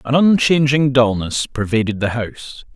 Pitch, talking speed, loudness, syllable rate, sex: 125 Hz, 130 wpm, -16 LUFS, 4.7 syllables/s, male